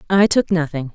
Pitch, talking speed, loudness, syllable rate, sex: 170 Hz, 190 wpm, -17 LUFS, 5.3 syllables/s, female